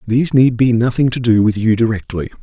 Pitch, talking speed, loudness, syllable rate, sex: 115 Hz, 225 wpm, -14 LUFS, 6.0 syllables/s, male